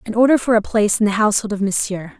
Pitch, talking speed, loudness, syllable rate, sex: 210 Hz, 275 wpm, -17 LUFS, 7.3 syllables/s, female